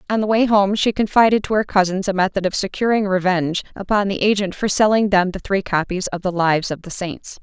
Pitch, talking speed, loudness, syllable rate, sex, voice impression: 195 Hz, 235 wpm, -18 LUFS, 5.9 syllables/s, female, feminine, adult-like, fluent, slightly cool, intellectual